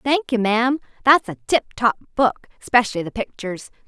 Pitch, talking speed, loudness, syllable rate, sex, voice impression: 230 Hz, 170 wpm, -20 LUFS, 5.3 syllables/s, female, feminine, adult-like, tensed, powerful, bright, slightly soft, clear, fluent, intellectual, calm, friendly, reassuring, elegant, lively, kind